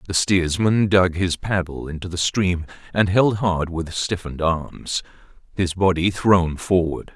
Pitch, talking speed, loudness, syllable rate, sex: 90 Hz, 150 wpm, -21 LUFS, 4.1 syllables/s, male